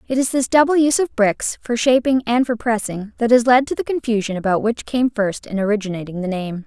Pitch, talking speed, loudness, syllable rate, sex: 230 Hz, 235 wpm, -18 LUFS, 5.8 syllables/s, female